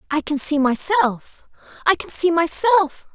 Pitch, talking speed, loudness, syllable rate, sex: 325 Hz, 135 wpm, -18 LUFS, 4.0 syllables/s, female